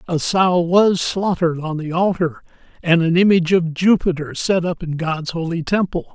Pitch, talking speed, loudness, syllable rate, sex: 170 Hz, 175 wpm, -18 LUFS, 4.9 syllables/s, male